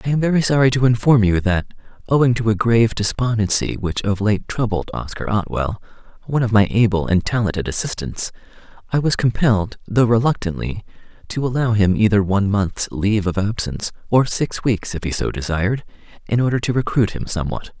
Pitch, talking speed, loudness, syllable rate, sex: 110 Hz, 180 wpm, -19 LUFS, 5.8 syllables/s, male